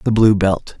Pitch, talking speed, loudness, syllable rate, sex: 100 Hz, 225 wpm, -15 LUFS, 4.6 syllables/s, male